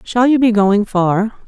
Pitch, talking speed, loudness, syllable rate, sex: 215 Hz, 205 wpm, -14 LUFS, 4.0 syllables/s, female